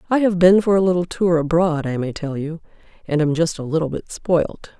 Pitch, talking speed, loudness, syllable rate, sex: 165 Hz, 240 wpm, -19 LUFS, 5.5 syllables/s, female